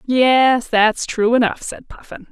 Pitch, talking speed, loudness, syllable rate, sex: 235 Hz, 155 wpm, -15 LUFS, 3.7 syllables/s, female